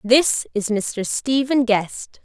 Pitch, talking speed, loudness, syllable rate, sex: 235 Hz, 135 wpm, -20 LUFS, 2.9 syllables/s, female